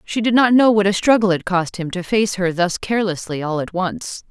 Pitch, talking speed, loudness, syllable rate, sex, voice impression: 195 Hz, 250 wpm, -18 LUFS, 5.3 syllables/s, female, feminine, adult-like, tensed, powerful, clear, fluent, intellectual, elegant, lively, slightly strict, sharp